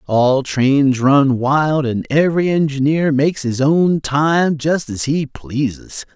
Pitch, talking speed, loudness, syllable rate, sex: 140 Hz, 145 wpm, -16 LUFS, 3.6 syllables/s, male